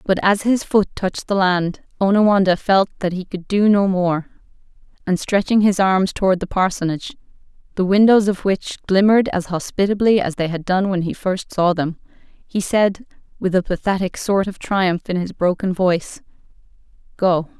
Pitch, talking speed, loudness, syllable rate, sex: 190 Hz, 175 wpm, -18 LUFS, 5.0 syllables/s, female